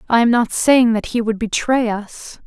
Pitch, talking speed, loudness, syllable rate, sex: 230 Hz, 220 wpm, -16 LUFS, 4.5 syllables/s, female